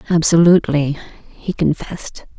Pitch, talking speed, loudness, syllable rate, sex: 160 Hz, 75 wpm, -15 LUFS, 4.7 syllables/s, female